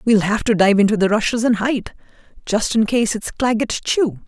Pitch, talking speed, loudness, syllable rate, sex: 220 Hz, 210 wpm, -18 LUFS, 5.1 syllables/s, female